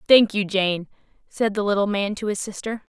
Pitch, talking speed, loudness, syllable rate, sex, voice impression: 205 Hz, 205 wpm, -22 LUFS, 5.2 syllables/s, female, slightly gender-neutral, slightly young, bright, soft, fluent, friendly, lively, kind, light